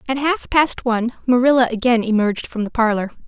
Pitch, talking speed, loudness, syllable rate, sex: 240 Hz, 185 wpm, -18 LUFS, 6.1 syllables/s, female